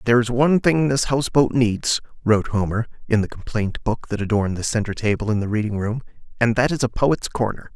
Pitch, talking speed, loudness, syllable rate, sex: 115 Hz, 215 wpm, -21 LUFS, 6.0 syllables/s, male